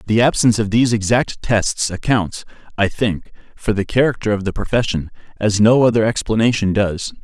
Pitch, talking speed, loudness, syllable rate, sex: 110 Hz, 165 wpm, -17 LUFS, 5.4 syllables/s, male